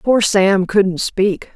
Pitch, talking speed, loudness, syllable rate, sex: 195 Hz, 155 wpm, -15 LUFS, 2.8 syllables/s, female